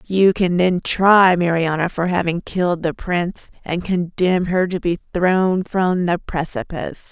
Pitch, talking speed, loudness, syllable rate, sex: 180 Hz, 160 wpm, -18 LUFS, 4.3 syllables/s, female